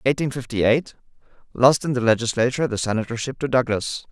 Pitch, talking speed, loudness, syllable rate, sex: 125 Hz, 145 wpm, -21 LUFS, 6.3 syllables/s, male